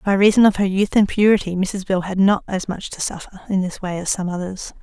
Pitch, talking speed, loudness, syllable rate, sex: 190 Hz, 260 wpm, -19 LUFS, 5.7 syllables/s, female